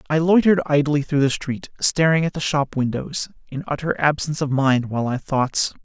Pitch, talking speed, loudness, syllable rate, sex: 145 Hz, 195 wpm, -20 LUFS, 5.4 syllables/s, male